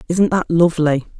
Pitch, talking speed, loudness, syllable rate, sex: 165 Hz, 150 wpm, -16 LUFS, 5.4 syllables/s, female